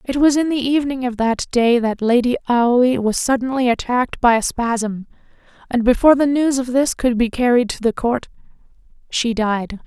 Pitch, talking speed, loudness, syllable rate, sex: 245 Hz, 190 wpm, -17 LUFS, 5.2 syllables/s, female